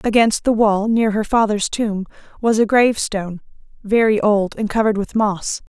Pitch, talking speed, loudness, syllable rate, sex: 215 Hz, 165 wpm, -18 LUFS, 5.0 syllables/s, female